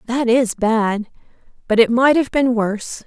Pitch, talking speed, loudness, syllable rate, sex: 235 Hz, 175 wpm, -17 LUFS, 4.4 syllables/s, female